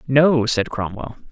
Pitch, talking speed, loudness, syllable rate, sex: 130 Hz, 135 wpm, -19 LUFS, 3.8 syllables/s, male